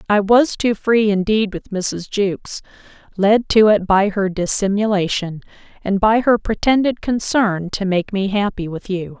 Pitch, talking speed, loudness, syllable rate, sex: 205 Hz, 165 wpm, -17 LUFS, 4.3 syllables/s, female